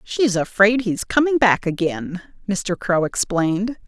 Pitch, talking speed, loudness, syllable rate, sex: 200 Hz, 140 wpm, -19 LUFS, 4.1 syllables/s, female